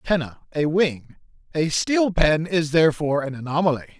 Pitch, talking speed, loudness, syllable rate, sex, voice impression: 160 Hz, 150 wpm, -22 LUFS, 5.6 syllables/s, male, very masculine, middle-aged, slightly thick, tensed, slightly powerful, bright, slightly soft, clear, very fluent, raspy, slightly cool, intellectual, very refreshing, slightly sincere, slightly calm, friendly, reassuring, very unique, slightly elegant, wild, slightly sweet, very lively, kind, intense, light